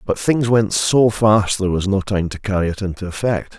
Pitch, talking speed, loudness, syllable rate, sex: 100 Hz, 235 wpm, -18 LUFS, 5.2 syllables/s, male